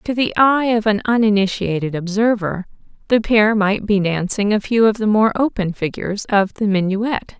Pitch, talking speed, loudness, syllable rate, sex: 210 Hz, 180 wpm, -17 LUFS, 4.8 syllables/s, female